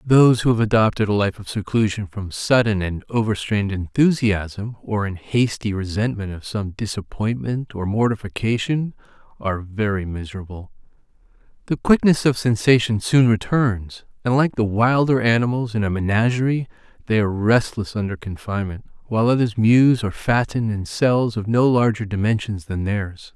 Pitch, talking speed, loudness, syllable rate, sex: 110 Hz, 145 wpm, -20 LUFS, 5.0 syllables/s, male